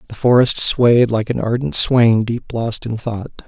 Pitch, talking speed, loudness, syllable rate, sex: 115 Hz, 190 wpm, -16 LUFS, 4.0 syllables/s, male